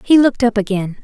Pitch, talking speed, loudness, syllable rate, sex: 225 Hz, 235 wpm, -15 LUFS, 6.7 syllables/s, female